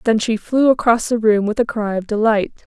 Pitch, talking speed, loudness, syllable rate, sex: 220 Hz, 240 wpm, -17 LUFS, 5.4 syllables/s, female